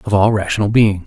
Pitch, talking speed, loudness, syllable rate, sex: 105 Hz, 225 wpm, -15 LUFS, 5.8 syllables/s, male